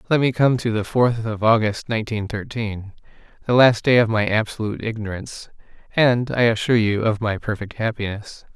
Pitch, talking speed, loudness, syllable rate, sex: 110 Hz, 170 wpm, -20 LUFS, 5.4 syllables/s, male